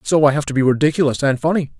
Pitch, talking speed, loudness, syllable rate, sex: 145 Hz, 265 wpm, -17 LUFS, 7.3 syllables/s, male